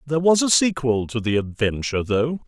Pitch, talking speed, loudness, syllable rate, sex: 130 Hz, 195 wpm, -20 LUFS, 5.7 syllables/s, male